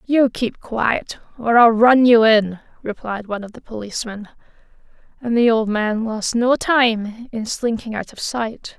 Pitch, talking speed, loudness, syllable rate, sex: 225 Hz, 170 wpm, -18 LUFS, 4.3 syllables/s, female